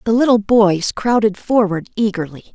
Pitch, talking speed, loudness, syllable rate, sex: 210 Hz, 140 wpm, -16 LUFS, 4.9 syllables/s, female